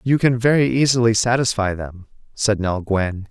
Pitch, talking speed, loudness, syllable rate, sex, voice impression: 110 Hz, 165 wpm, -18 LUFS, 4.8 syllables/s, male, very masculine, adult-like, fluent, intellectual, calm, slightly mature, elegant